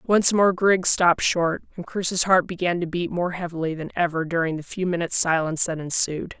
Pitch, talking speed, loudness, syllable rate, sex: 175 Hz, 205 wpm, -22 LUFS, 5.4 syllables/s, female